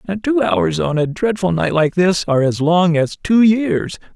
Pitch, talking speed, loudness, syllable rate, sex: 170 Hz, 215 wpm, -16 LUFS, 4.3 syllables/s, male